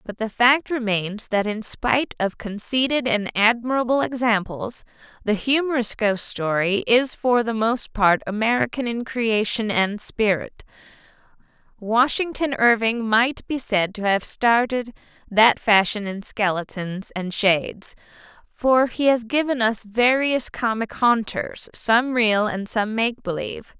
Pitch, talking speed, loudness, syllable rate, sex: 225 Hz, 135 wpm, -21 LUFS, 4.0 syllables/s, female